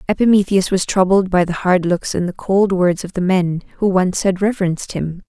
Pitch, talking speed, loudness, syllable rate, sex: 185 Hz, 215 wpm, -17 LUFS, 5.3 syllables/s, female